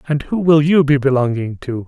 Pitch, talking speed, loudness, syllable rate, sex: 140 Hz, 225 wpm, -15 LUFS, 5.3 syllables/s, male